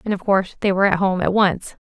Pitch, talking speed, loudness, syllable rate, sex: 190 Hz, 290 wpm, -18 LUFS, 6.6 syllables/s, female